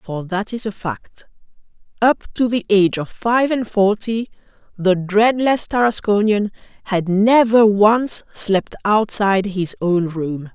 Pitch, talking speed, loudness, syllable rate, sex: 205 Hz, 135 wpm, -17 LUFS, 3.9 syllables/s, female